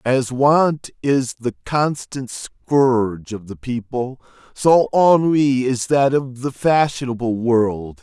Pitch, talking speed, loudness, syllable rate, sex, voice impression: 130 Hz, 125 wpm, -18 LUFS, 3.4 syllables/s, male, masculine, middle-aged, tensed, powerful, clear, raspy, cool, intellectual, mature, slightly reassuring, wild, lively, strict